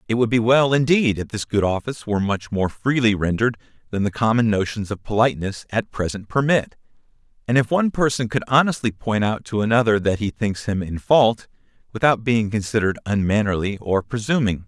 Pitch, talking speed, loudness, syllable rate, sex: 110 Hz, 185 wpm, -20 LUFS, 5.8 syllables/s, male